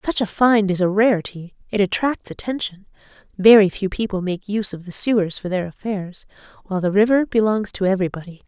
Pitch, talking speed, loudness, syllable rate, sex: 200 Hz, 185 wpm, -19 LUFS, 5.9 syllables/s, female